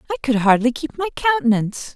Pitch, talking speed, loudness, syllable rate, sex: 275 Hz, 185 wpm, -19 LUFS, 6.6 syllables/s, female